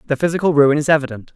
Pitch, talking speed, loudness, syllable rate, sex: 145 Hz, 220 wpm, -16 LUFS, 7.7 syllables/s, male